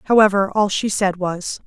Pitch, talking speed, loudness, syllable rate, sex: 195 Hz, 180 wpm, -18 LUFS, 4.4 syllables/s, female